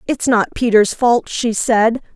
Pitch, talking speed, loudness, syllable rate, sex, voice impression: 230 Hz, 165 wpm, -15 LUFS, 3.9 syllables/s, female, very feminine, middle-aged, thin, tensed, slightly powerful, slightly bright, hard, clear, fluent, slightly cute, intellectual, refreshing, slightly sincere, slightly calm, slightly friendly, slightly reassuring, slightly unique, elegant, slightly wild, slightly sweet, slightly lively, kind, slightly light